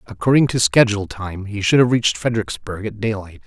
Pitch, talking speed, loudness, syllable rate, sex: 110 Hz, 190 wpm, -18 LUFS, 6.1 syllables/s, male